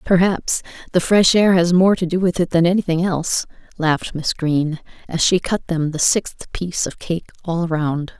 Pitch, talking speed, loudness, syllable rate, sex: 170 Hz, 200 wpm, -18 LUFS, 4.9 syllables/s, female